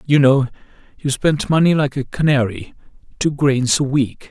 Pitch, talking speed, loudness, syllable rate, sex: 135 Hz, 165 wpm, -17 LUFS, 4.6 syllables/s, male